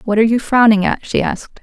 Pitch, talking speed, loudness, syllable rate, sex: 225 Hz, 260 wpm, -14 LUFS, 6.6 syllables/s, female